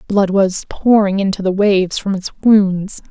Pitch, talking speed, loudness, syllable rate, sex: 195 Hz, 175 wpm, -15 LUFS, 4.2 syllables/s, female